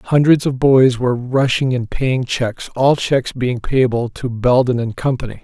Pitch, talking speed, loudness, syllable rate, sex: 125 Hz, 175 wpm, -16 LUFS, 4.3 syllables/s, male